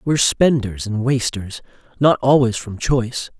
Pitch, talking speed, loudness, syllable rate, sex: 120 Hz, 125 wpm, -18 LUFS, 4.6 syllables/s, male